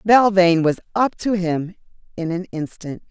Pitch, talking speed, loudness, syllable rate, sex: 180 Hz, 155 wpm, -19 LUFS, 4.6 syllables/s, female